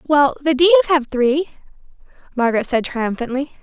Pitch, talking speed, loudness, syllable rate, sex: 275 Hz, 130 wpm, -17 LUFS, 5.4 syllables/s, female